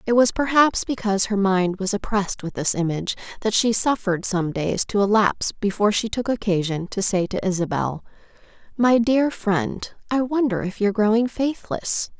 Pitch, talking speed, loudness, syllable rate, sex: 210 Hz, 170 wpm, -21 LUFS, 5.2 syllables/s, female